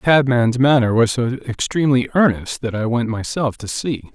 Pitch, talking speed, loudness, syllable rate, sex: 125 Hz, 190 wpm, -18 LUFS, 5.1 syllables/s, male